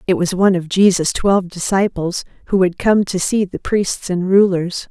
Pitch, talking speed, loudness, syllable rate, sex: 185 Hz, 195 wpm, -16 LUFS, 4.9 syllables/s, female